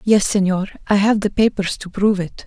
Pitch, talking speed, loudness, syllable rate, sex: 200 Hz, 220 wpm, -18 LUFS, 5.6 syllables/s, female